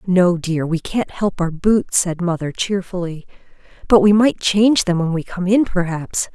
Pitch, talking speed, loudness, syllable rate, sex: 185 Hz, 190 wpm, -18 LUFS, 4.5 syllables/s, female